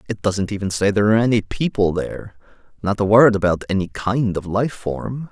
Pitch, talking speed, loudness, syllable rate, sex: 105 Hz, 205 wpm, -19 LUFS, 5.6 syllables/s, male